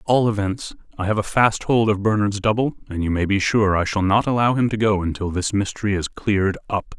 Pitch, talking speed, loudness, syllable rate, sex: 105 Hz, 250 wpm, -20 LUFS, 5.8 syllables/s, male